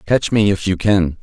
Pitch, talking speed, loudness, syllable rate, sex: 95 Hz, 245 wpm, -16 LUFS, 4.7 syllables/s, male